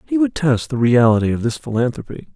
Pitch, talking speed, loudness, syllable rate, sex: 135 Hz, 205 wpm, -17 LUFS, 6.1 syllables/s, male